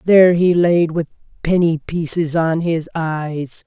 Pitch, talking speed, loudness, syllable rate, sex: 165 Hz, 145 wpm, -17 LUFS, 3.9 syllables/s, female